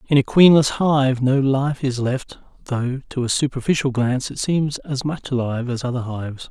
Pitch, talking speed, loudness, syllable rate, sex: 130 Hz, 195 wpm, -20 LUFS, 5.0 syllables/s, male